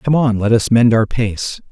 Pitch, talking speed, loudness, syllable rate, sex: 115 Hz, 245 wpm, -15 LUFS, 4.5 syllables/s, male